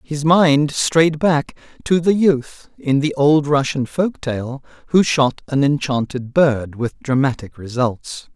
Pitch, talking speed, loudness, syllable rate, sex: 145 Hz, 150 wpm, -17 LUFS, 3.6 syllables/s, male